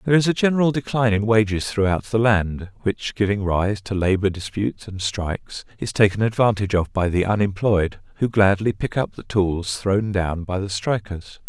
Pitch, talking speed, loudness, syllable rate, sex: 105 Hz, 190 wpm, -21 LUFS, 5.2 syllables/s, male